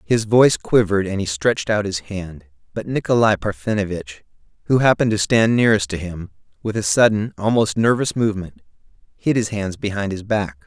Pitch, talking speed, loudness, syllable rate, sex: 105 Hz, 175 wpm, -19 LUFS, 5.5 syllables/s, male